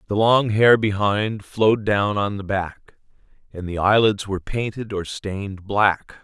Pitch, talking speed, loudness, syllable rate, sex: 100 Hz, 165 wpm, -20 LUFS, 4.2 syllables/s, male